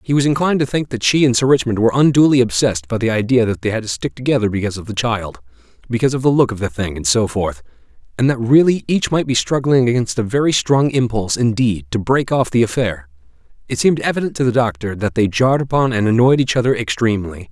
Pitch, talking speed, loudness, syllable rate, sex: 115 Hz, 235 wpm, -16 LUFS, 6.6 syllables/s, male